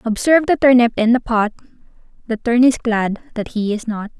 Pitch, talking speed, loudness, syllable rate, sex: 235 Hz, 200 wpm, -16 LUFS, 5.5 syllables/s, female